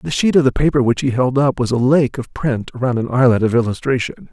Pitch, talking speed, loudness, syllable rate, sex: 130 Hz, 265 wpm, -16 LUFS, 6.0 syllables/s, male